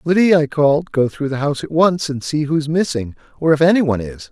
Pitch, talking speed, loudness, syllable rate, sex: 150 Hz, 265 wpm, -17 LUFS, 6.3 syllables/s, male